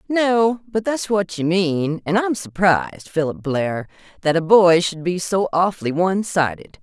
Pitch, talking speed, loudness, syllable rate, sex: 180 Hz, 175 wpm, -19 LUFS, 4.4 syllables/s, female